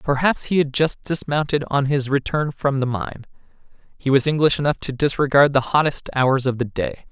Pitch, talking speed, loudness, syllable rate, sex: 140 Hz, 195 wpm, -20 LUFS, 5.2 syllables/s, male